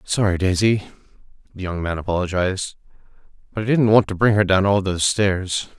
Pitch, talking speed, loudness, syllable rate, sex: 95 Hz, 175 wpm, -19 LUFS, 5.7 syllables/s, male